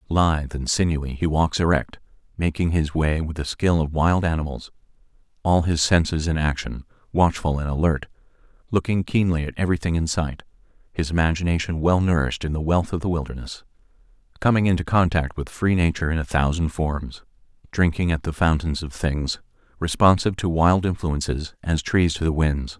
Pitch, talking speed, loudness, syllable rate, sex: 80 Hz, 170 wpm, -22 LUFS, 5.5 syllables/s, male